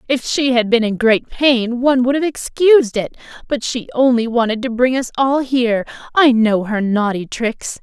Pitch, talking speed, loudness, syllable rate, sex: 245 Hz, 200 wpm, -16 LUFS, 4.8 syllables/s, female